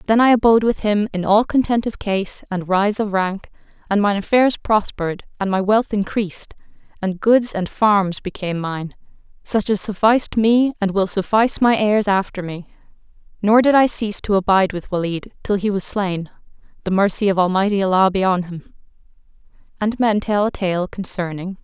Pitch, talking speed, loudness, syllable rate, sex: 200 Hz, 180 wpm, -18 LUFS, 5.2 syllables/s, female